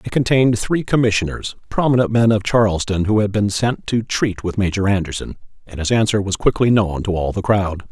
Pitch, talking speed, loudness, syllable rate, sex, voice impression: 105 Hz, 205 wpm, -18 LUFS, 5.6 syllables/s, male, masculine, adult-like, slightly fluent, cool, slightly intellectual, slightly elegant